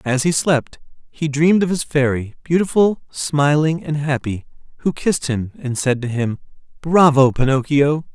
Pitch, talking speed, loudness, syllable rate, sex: 145 Hz, 155 wpm, -18 LUFS, 4.6 syllables/s, male